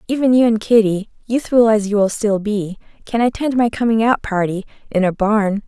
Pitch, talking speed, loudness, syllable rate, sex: 215 Hz, 200 wpm, -17 LUFS, 5.2 syllables/s, female